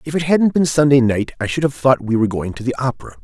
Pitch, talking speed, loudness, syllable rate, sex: 130 Hz, 295 wpm, -17 LUFS, 6.6 syllables/s, male